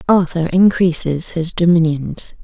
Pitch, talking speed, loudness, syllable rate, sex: 170 Hz, 100 wpm, -15 LUFS, 4.0 syllables/s, female